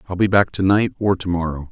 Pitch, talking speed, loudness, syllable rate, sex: 95 Hz, 280 wpm, -18 LUFS, 6.2 syllables/s, male